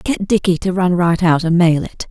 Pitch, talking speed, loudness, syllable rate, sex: 175 Hz, 255 wpm, -15 LUFS, 4.8 syllables/s, female